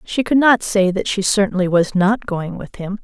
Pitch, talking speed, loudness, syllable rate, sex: 200 Hz, 235 wpm, -17 LUFS, 4.8 syllables/s, female